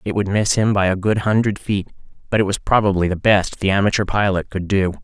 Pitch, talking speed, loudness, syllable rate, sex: 100 Hz, 240 wpm, -18 LUFS, 5.9 syllables/s, male